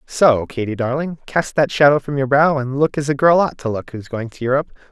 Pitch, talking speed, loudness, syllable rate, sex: 135 Hz, 255 wpm, -18 LUFS, 5.8 syllables/s, male